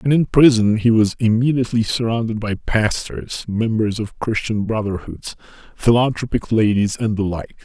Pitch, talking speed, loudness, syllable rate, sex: 110 Hz, 140 wpm, -18 LUFS, 4.9 syllables/s, male